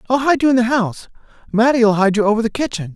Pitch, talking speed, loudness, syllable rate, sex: 230 Hz, 225 wpm, -16 LUFS, 6.9 syllables/s, male